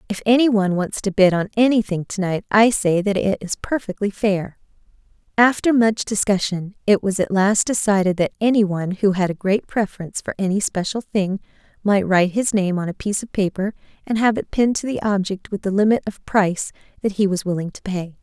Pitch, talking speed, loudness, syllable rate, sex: 200 Hz, 210 wpm, -20 LUFS, 5.7 syllables/s, female